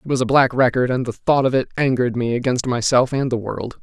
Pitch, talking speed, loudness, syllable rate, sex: 125 Hz, 265 wpm, -19 LUFS, 6.1 syllables/s, male